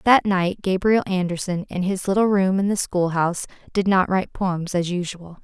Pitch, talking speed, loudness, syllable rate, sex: 185 Hz, 190 wpm, -21 LUFS, 4.9 syllables/s, female